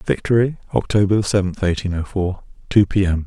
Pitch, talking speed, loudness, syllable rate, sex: 95 Hz, 165 wpm, -19 LUFS, 5.0 syllables/s, male